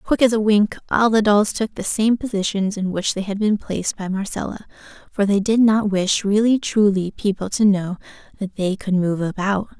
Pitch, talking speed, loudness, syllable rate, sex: 205 Hz, 210 wpm, -19 LUFS, 5.0 syllables/s, female